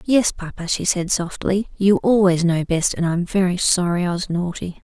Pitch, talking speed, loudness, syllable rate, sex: 180 Hz, 210 wpm, -19 LUFS, 4.9 syllables/s, female